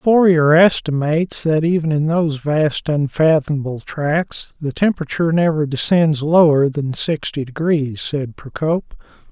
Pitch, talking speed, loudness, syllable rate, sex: 155 Hz, 120 wpm, -17 LUFS, 4.5 syllables/s, male